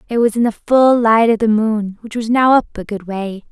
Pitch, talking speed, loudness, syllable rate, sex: 225 Hz, 275 wpm, -15 LUFS, 4.9 syllables/s, female